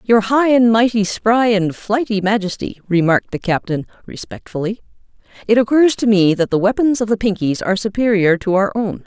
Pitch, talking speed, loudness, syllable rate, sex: 210 Hz, 180 wpm, -16 LUFS, 5.4 syllables/s, female